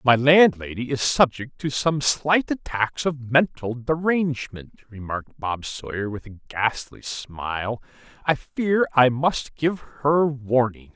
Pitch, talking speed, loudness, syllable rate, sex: 135 Hz, 135 wpm, -22 LUFS, 3.8 syllables/s, male